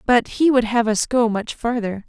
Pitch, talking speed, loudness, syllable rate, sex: 230 Hz, 230 wpm, -19 LUFS, 4.6 syllables/s, female